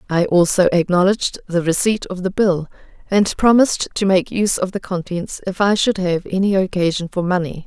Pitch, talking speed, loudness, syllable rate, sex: 185 Hz, 190 wpm, -18 LUFS, 5.4 syllables/s, female